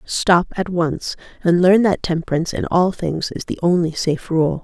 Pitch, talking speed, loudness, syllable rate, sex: 175 Hz, 195 wpm, -18 LUFS, 4.9 syllables/s, female